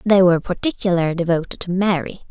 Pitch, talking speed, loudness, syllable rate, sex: 180 Hz, 155 wpm, -19 LUFS, 6.4 syllables/s, female